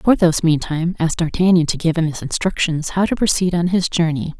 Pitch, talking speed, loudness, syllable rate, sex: 170 Hz, 205 wpm, -18 LUFS, 5.8 syllables/s, female